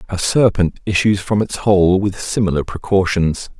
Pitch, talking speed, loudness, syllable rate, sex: 95 Hz, 150 wpm, -16 LUFS, 4.5 syllables/s, male